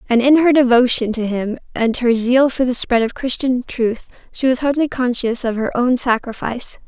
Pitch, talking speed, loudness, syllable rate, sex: 245 Hz, 200 wpm, -17 LUFS, 5.0 syllables/s, female